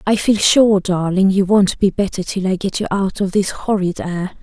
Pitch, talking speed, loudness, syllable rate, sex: 195 Hz, 230 wpm, -16 LUFS, 4.7 syllables/s, female